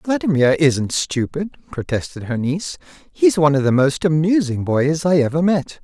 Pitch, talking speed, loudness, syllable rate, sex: 150 Hz, 165 wpm, -18 LUFS, 5.1 syllables/s, male